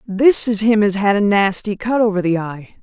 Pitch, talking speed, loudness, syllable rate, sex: 205 Hz, 235 wpm, -16 LUFS, 4.8 syllables/s, female